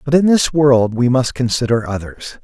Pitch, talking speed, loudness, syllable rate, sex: 130 Hz, 195 wpm, -15 LUFS, 5.0 syllables/s, male